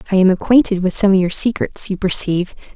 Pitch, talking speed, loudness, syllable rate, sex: 195 Hz, 220 wpm, -15 LUFS, 6.5 syllables/s, female